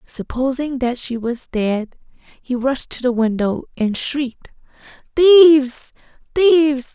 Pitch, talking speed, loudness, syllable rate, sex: 265 Hz, 120 wpm, -17 LUFS, 3.8 syllables/s, female